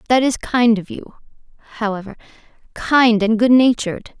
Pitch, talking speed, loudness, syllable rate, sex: 230 Hz, 115 wpm, -16 LUFS, 5.1 syllables/s, female